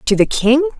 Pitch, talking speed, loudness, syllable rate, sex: 265 Hz, 225 wpm, -14 LUFS, 5.5 syllables/s, female